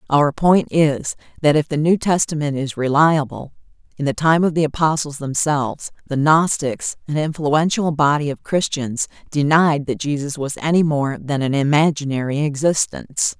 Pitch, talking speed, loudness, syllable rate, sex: 150 Hz, 150 wpm, -18 LUFS, 4.8 syllables/s, female